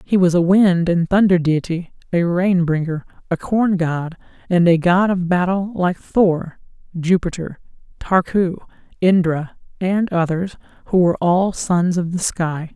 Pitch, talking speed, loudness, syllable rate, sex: 175 Hz, 150 wpm, -18 LUFS, 4.2 syllables/s, female